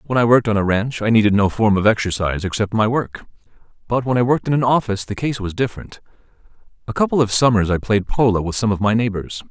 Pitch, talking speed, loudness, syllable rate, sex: 110 Hz, 240 wpm, -18 LUFS, 6.8 syllables/s, male